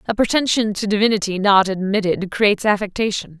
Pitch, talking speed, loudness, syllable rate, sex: 205 Hz, 140 wpm, -18 LUFS, 5.9 syllables/s, female